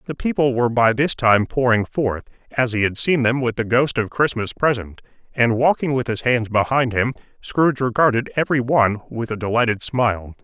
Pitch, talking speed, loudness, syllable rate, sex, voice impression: 120 Hz, 195 wpm, -19 LUFS, 5.4 syllables/s, male, very masculine, slightly old, thick, muffled, slightly intellectual, sincere